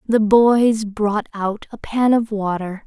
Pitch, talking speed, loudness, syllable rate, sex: 215 Hz, 165 wpm, -18 LUFS, 3.4 syllables/s, female